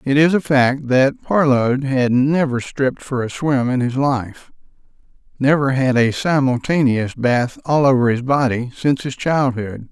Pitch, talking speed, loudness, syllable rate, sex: 135 Hz, 165 wpm, -17 LUFS, 4.3 syllables/s, male